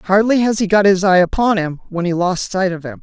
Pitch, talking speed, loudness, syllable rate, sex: 190 Hz, 275 wpm, -15 LUFS, 5.5 syllables/s, female